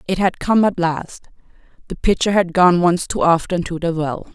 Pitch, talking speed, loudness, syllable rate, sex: 175 Hz, 195 wpm, -17 LUFS, 4.8 syllables/s, female